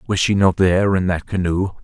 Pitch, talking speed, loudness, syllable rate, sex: 95 Hz, 230 wpm, -17 LUFS, 5.6 syllables/s, male